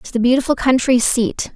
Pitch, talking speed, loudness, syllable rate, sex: 245 Hz, 195 wpm, -16 LUFS, 5.3 syllables/s, female